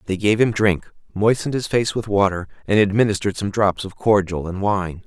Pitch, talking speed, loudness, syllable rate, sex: 100 Hz, 200 wpm, -20 LUFS, 5.5 syllables/s, male